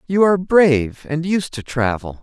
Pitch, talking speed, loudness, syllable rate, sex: 150 Hz, 190 wpm, -17 LUFS, 4.9 syllables/s, male